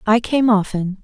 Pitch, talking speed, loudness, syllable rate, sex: 215 Hz, 175 wpm, -17 LUFS, 4.6 syllables/s, female